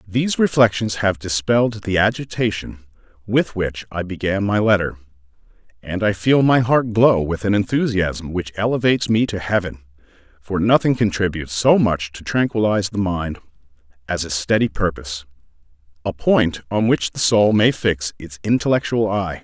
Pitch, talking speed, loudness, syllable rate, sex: 100 Hz, 150 wpm, -19 LUFS, 5.1 syllables/s, male